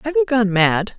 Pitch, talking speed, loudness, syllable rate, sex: 215 Hz, 245 wpm, -17 LUFS, 4.8 syllables/s, female